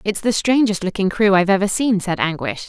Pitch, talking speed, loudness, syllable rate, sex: 200 Hz, 225 wpm, -18 LUFS, 5.8 syllables/s, female